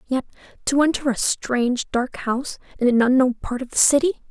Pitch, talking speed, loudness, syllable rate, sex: 255 Hz, 180 wpm, -20 LUFS, 5.5 syllables/s, female